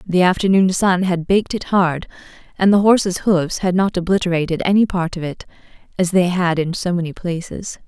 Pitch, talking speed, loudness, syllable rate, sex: 180 Hz, 190 wpm, -17 LUFS, 5.4 syllables/s, female